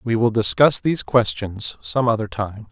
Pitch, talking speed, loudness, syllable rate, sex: 115 Hz, 175 wpm, -20 LUFS, 4.6 syllables/s, male